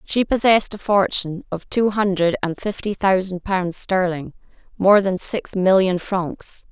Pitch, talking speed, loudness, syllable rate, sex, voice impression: 190 Hz, 150 wpm, -19 LUFS, 4.3 syllables/s, female, feminine, adult-like, slightly tensed, clear, fluent, slightly calm, friendly